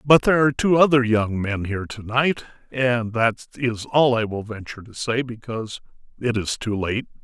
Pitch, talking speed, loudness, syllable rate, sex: 120 Hz, 200 wpm, -21 LUFS, 5.3 syllables/s, male